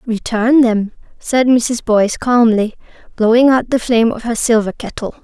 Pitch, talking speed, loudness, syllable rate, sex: 230 Hz, 160 wpm, -14 LUFS, 4.9 syllables/s, female